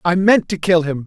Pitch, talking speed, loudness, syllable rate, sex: 175 Hz, 280 wpm, -16 LUFS, 5.2 syllables/s, male